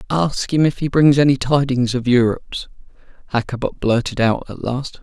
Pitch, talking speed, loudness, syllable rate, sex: 130 Hz, 165 wpm, -18 LUFS, 5.4 syllables/s, male